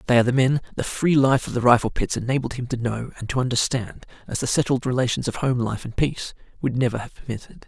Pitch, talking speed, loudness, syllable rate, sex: 125 Hz, 240 wpm, -23 LUFS, 6.5 syllables/s, male